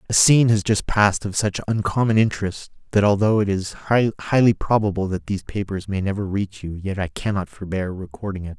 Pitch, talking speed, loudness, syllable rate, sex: 100 Hz, 195 wpm, -21 LUFS, 5.6 syllables/s, male